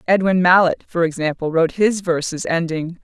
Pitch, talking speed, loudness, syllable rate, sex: 170 Hz, 160 wpm, -18 LUFS, 5.3 syllables/s, female